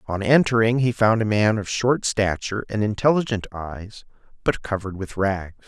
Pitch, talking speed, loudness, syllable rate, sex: 105 Hz, 170 wpm, -22 LUFS, 5.1 syllables/s, male